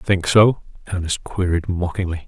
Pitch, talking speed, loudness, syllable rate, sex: 90 Hz, 130 wpm, -19 LUFS, 4.7 syllables/s, male